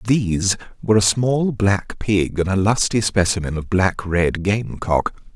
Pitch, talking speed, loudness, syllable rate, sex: 100 Hz, 155 wpm, -19 LUFS, 4.4 syllables/s, male